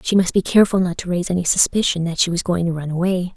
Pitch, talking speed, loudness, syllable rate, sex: 180 Hz, 285 wpm, -18 LUFS, 7.1 syllables/s, female